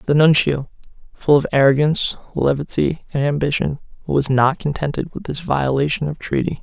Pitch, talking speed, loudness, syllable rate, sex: 145 Hz, 145 wpm, -19 LUFS, 5.3 syllables/s, male